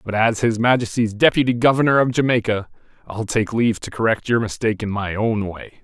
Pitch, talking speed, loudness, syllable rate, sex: 115 Hz, 195 wpm, -19 LUFS, 5.9 syllables/s, male